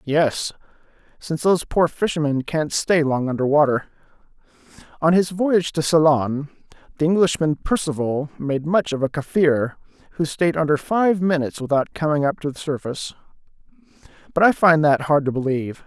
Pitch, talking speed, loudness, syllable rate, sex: 155 Hz, 150 wpm, -20 LUFS, 5.3 syllables/s, male